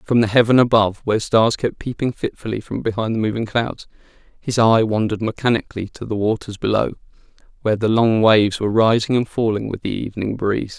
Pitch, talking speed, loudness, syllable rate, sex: 110 Hz, 190 wpm, -19 LUFS, 6.2 syllables/s, male